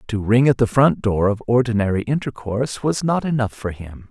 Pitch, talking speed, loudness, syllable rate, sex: 115 Hz, 205 wpm, -19 LUFS, 5.3 syllables/s, male